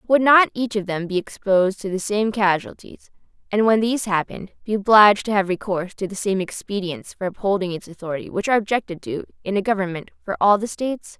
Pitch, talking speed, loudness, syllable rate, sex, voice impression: 200 Hz, 210 wpm, -21 LUFS, 6.1 syllables/s, female, feminine, adult-like, slightly bright, clear, fluent, intellectual, slightly friendly, unique, lively, slightly strict, slightly sharp